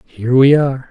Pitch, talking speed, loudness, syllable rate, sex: 130 Hz, 200 wpm, -12 LUFS, 6.2 syllables/s, male